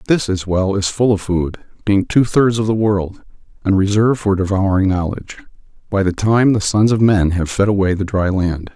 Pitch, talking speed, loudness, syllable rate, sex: 100 Hz, 210 wpm, -16 LUFS, 5.1 syllables/s, male